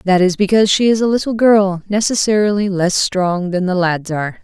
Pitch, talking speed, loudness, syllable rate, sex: 195 Hz, 205 wpm, -15 LUFS, 5.4 syllables/s, female